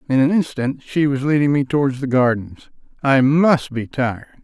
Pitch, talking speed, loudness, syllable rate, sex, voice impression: 135 Hz, 190 wpm, -18 LUFS, 5.0 syllables/s, male, very masculine, very adult-like, slightly old, very thick, slightly relaxed, powerful, dark, soft, slightly muffled, fluent, slightly raspy, cool, intellectual, sincere, calm, very mature, friendly, reassuring, unique, slightly elegant, wild, slightly sweet, lively, kind, slightly modest